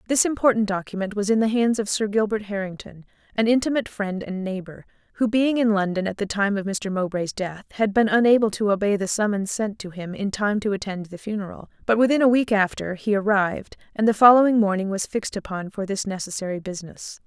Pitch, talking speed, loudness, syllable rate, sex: 205 Hz, 210 wpm, -22 LUFS, 6.0 syllables/s, female